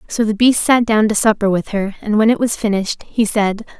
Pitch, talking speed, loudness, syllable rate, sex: 215 Hz, 255 wpm, -16 LUFS, 5.5 syllables/s, female